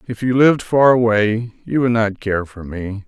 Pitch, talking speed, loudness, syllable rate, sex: 115 Hz, 215 wpm, -17 LUFS, 4.7 syllables/s, male